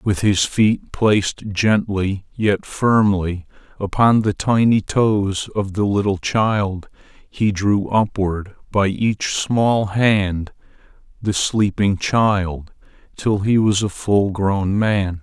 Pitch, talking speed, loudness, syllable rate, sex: 100 Hz, 125 wpm, -18 LUFS, 3.0 syllables/s, male